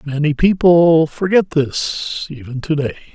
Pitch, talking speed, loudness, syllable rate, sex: 155 Hz, 135 wpm, -16 LUFS, 3.9 syllables/s, male